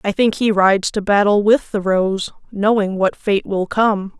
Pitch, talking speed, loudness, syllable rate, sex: 205 Hz, 200 wpm, -17 LUFS, 4.4 syllables/s, female